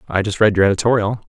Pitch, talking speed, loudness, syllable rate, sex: 105 Hz, 230 wpm, -16 LUFS, 7.2 syllables/s, male